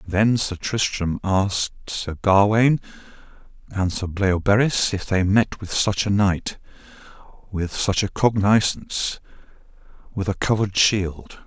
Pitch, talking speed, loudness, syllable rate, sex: 100 Hz, 125 wpm, -21 LUFS, 4.2 syllables/s, male